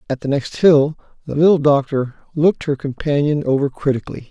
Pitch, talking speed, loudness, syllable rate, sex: 145 Hz, 165 wpm, -17 LUFS, 5.8 syllables/s, male